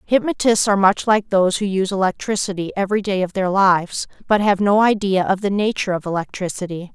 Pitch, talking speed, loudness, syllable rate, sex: 195 Hz, 190 wpm, -18 LUFS, 6.2 syllables/s, female